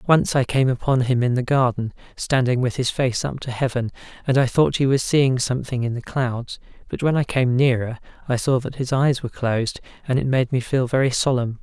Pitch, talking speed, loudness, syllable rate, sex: 130 Hz, 225 wpm, -21 LUFS, 5.5 syllables/s, male